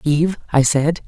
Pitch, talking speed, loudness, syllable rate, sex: 155 Hz, 170 wpm, -17 LUFS, 5.0 syllables/s, female